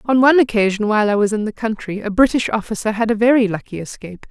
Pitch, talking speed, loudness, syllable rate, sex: 220 Hz, 235 wpm, -17 LUFS, 6.9 syllables/s, female